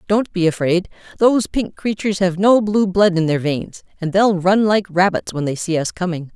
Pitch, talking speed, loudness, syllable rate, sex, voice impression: 185 Hz, 215 wpm, -17 LUFS, 5.1 syllables/s, female, very feminine, very adult-like, intellectual, elegant